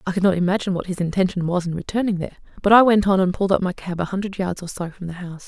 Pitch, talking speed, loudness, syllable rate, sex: 185 Hz, 305 wpm, -21 LUFS, 7.8 syllables/s, female